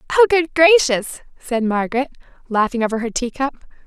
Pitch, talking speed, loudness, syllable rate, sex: 265 Hz, 140 wpm, -18 LUFS, 5.1 syllables/s, female